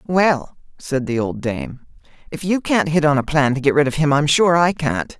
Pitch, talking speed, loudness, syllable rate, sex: 145 Hz, 245 wpm, -18 LUFS, 4.7 syllables/s, male